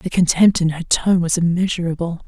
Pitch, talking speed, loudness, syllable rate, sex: 170 Hz, 185 wpm, -17 LUFS, 5.4 syllables/s, female